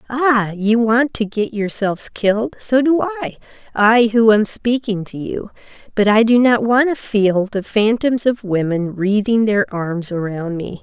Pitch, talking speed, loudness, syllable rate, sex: 215 Hz, 170 wpm, -17 LUFS, 4.1 syllables/s, female